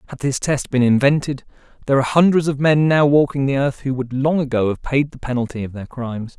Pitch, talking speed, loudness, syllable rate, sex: 135 Hz, 235 wpm, -18 LUFS, 6.1 syllables/s, male